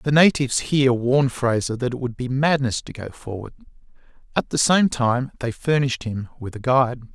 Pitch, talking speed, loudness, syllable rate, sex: 130 Hz, 195 wpm, -21 LUFS, 5.5 syllables/s, male